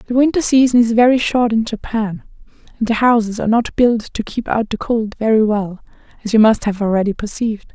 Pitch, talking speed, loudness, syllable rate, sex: 225 Hz, 210 wpm, -16 LUFS, 5.7 syllables/s, female